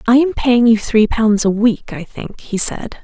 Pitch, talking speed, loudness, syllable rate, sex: 230 Hz, 240 wpm, -14 LUFS, 4.2 syllables/s, female